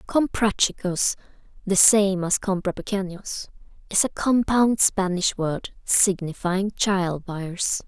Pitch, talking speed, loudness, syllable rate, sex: 190 Hz, 100 wpm, -22 LUFS, 3.6 syllables/s, female